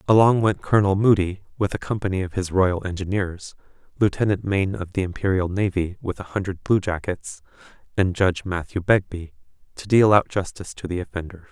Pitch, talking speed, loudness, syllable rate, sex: 95 Hz, 165 wpm, -22 LUFS, 5.8 syllables/s, male